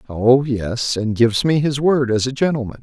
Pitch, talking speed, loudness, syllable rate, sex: 125 Hz, 215 wpm, -17 LUFS, 4.9 syllables/s, male